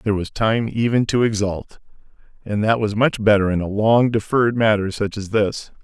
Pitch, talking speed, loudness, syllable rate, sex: 105 Hz, 195 wpm, -19 LUFS, 5.2 syllables/s, male